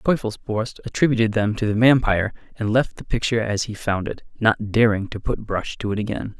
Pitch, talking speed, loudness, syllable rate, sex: 110 Hz, 205 wpm, -22 LUFS, 5.7 syllables/s, male